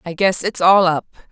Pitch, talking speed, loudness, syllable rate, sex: 180 Hz, 230 wpm, -16 LUFS, 5.2 syllables/s, female